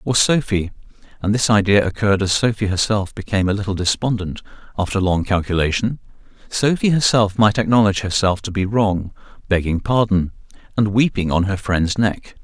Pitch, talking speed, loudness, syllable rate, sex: 100 Hz, 145 wpm, -18 LUFS, 5.5 syllables/s, male